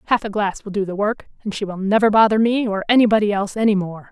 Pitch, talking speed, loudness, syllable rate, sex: 210 Hz, 265 wpm, -18 LUFS, 6.7 syllables/s, female